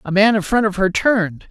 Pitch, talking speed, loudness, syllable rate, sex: 200 Hz, 280 wpm, -16 LUFS, 5.7 syllables/s, female